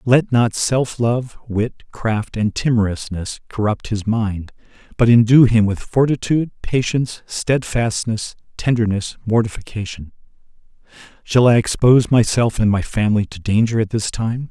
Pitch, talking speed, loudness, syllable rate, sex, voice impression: 115 Hz, 130 wpm, -18 LUFS, 4.6 syllables/s, male, very masculine, very adult-like, middle-aged, thick, tensed, slightly powerful, bright, slightly soft, slightly muffled, fluent, cool, intellectual, slightly refreshing, sincere, calm, mature, friendly, very reassuring, elegant, slightly sweet, slightly lively, very kind, slightly modest